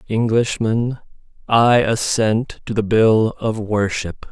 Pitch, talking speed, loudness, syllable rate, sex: 110 Hz, 110 wpm, -18 LUFS, 3.4 syllables/s, male